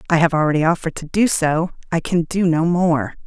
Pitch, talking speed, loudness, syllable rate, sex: 170 Hz, 200 wpm, -18 LUFS, 5.8 syllables/s, female